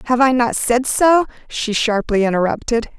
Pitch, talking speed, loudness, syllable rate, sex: 240 Hz, 160 wpm, -17 LUFS, 4.8 syllables/s, female